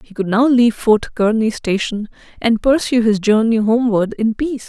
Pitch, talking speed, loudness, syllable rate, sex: 225 Hz, 180 wpm, -16 LUFS, 5.2 syllables/s, female